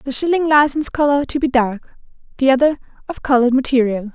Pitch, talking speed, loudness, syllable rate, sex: 265 Hz, 175 wpm, -16 LUFS, 6.3 syllables/s, female